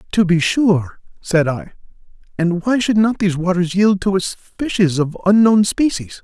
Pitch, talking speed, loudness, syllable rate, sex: 190 Hz, 175 wpm, -16 LUFS, 4.5 syllables/s, male